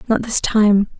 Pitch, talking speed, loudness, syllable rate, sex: 215 Hz, 180 wpm, -16 LUFS, 4.0 syllables/s, female